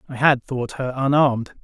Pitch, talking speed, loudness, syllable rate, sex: 130 Hz, 185 wpm, -20 LUFS, 5.2 syllables/s, male